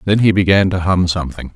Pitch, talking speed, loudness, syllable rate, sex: 90 Hz, 230 wpm, -14 LUFS, 6.4 syllables/s, male